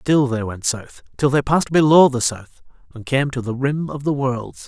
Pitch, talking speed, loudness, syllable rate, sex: 135 Hz, 230 wpm, -19 LUFS, 4.8 syllables/s, male